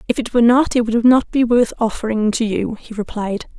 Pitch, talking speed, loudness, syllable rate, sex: 230 Hz, 235 wpm, -17 LUFS, 5.5 syllables/s, female